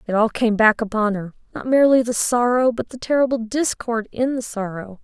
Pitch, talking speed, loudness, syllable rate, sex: 230 Hz, 205 wpm, -19 LUFS, 5.3 syllables/s, female